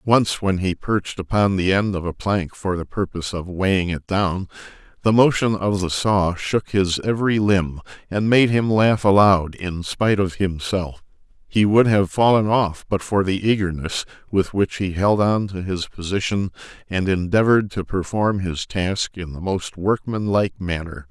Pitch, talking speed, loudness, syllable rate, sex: 95 Hz, 180 wpm, -20 LUFS, 4.6 syllables/s, male